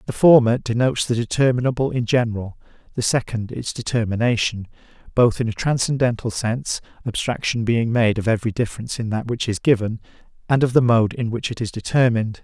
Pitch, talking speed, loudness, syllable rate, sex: 120 Hz, 175 wpm, -20 LUFS, 6.1 syllables/s, male